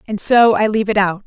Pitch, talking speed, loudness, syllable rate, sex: 210 Hz, 285 wpm, -14 LUFS, 6.2 syllables/s, female